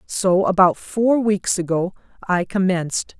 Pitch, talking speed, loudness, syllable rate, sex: 190 Hz, 130 wpm, -19 LUFS, 3.9 syllables/s, female